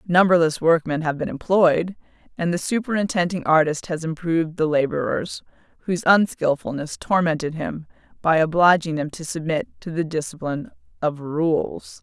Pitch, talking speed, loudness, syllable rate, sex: 165 Hz, 135 wpm, -21 LUFS, 5.1 syllables/s, female